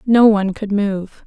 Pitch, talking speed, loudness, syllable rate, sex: 205 Hz, 190 wpm, -16 LUFS, 4.3 syllables/s, female